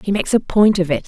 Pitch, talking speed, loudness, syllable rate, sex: 190 Hz, 335 wpm, -16 LUFS, 7.2 syllables/s, female